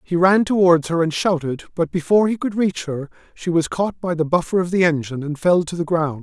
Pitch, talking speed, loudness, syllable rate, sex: 170 Hz, 250 wpm, -19 LUFS, 5.7 syllables/s, male